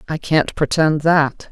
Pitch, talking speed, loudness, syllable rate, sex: 150 Hz, 160 wpm, -17 LUFS, 3.8 syllables/s, female